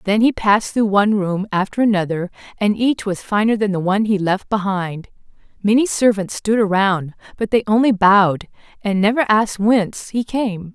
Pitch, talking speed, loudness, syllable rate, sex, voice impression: 205 Hz, 180 wpm, -17 LUFS, 5.2 syllables/s, female, feminine, slightly gender-neutral, slightly young, slightly adult-like, thin, tensed, slightly powerful, bright, slightly soft, very clear, fluent, cute, intellectual, slightly refreshing, sincere, slightly calm, very friendly, reassuring, unique, slightly sweet, very lively, kind